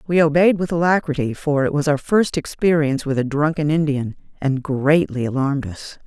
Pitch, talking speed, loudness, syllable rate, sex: 150 Hz, 180 wpm, -19 LUFS, 5.4 syllables/s, female